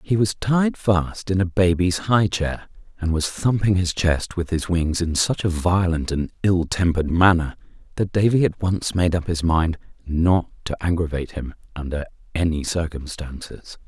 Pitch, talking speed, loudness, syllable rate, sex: 90 Hz, 175 wpm, -21 LUFS, 4.6 syllables/s, male